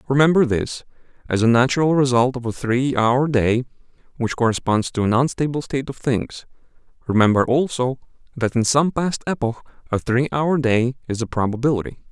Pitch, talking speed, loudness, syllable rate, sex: 125 Hz, 165 wpm, -20 LUFS, 5.4 syllables/s, male